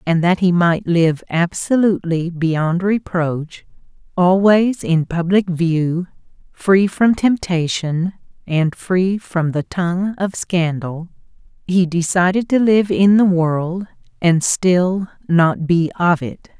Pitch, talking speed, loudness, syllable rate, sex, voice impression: 180 Hz, 125 wpm, -17 LUFS, 3.5 syllables/s, female, feminine, middle-aged, slightly thick, tensed, powerful, slightly hard, clear, slightly fluent, intellectual, slightly calm, elegant, lively, sharp